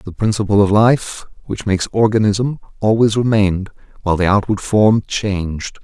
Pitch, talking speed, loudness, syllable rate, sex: 105 Hz, 145 wpm, -16 LUFS, 5.0 syllables/s, male